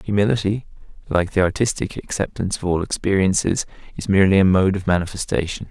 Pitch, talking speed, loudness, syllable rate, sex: 95 Hz, 145 wpm, -20 LUFS, 6.4 syllables/s, male